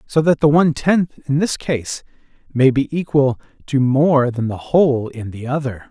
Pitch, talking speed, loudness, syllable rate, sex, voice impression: 135 Hz, 195 wpm, -17 LUFS, 4.6 syllables/s, male, very masculine, very adult-like, middle-aged, thick, tensed, slightly powerful, slightly bright, soft, slightly clear, fluent, cool, intellectual, slightly refreshing, sincere, calm, mature, friendly, reassuring, elegant, slightly sweet, slightly lively, kind